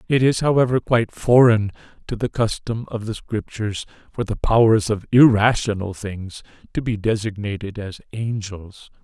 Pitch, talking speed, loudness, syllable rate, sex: 110 Hz, 145 wpm, -20 LUFS, 4.8 syllables/s, male